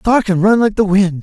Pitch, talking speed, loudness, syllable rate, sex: 200 Hz, 295 wpm, -13 LUFS, 4.8 syllables/s, male